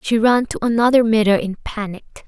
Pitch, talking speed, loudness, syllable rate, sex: 220 Hz, 185 wpm, -17 LUFS, 5.3 syllables/s, female